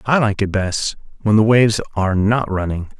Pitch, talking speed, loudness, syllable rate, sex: 105 Hz, 200 wpm, -17 LUFS, 5.3 syllables/s, male